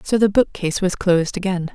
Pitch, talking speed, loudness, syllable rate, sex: 190 Hz, 205 wpm, -19 LUFS, 6.1 syllables/s, female